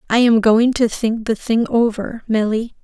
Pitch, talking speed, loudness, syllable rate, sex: 225 Hz, 190 wpm, -17 LUFS, 4.4 syllables/s, female